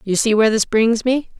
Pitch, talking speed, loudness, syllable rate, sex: 225 Hz, 260 wpm, -16 LUFS, 5.7 syllables/s, female